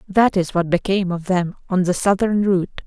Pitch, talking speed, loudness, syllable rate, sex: 185 Hz, 210 wpm, -19 LUFS, 5.5 syllables/s, female